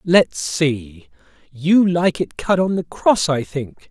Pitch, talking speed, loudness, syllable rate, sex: 160 Hz, 170 wpm, -18 LUFS, 3.2 syllables/s, male